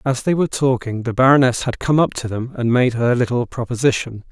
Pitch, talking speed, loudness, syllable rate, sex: 125 Hz, 225 wpm, -18 LUFS, 5.8 syllables/s, male